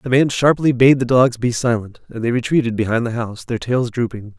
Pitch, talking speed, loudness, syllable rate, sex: 120 Hz, 235 wpm, -17 LUFS, 5.7 syllables/s, male